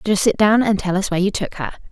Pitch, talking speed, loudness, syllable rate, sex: 200 Hz, 315 wpm, -18 LUFS, 6.9 syllables/s, female